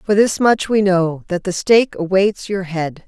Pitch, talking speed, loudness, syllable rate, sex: 190 Hz, 215 wpm, -17 LUFS, 4.5 syllables/s, female